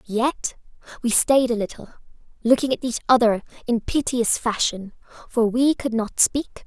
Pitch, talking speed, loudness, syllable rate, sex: 235 Hz, 155 wpm, -21 LUFS, 4.4 syllables/s, female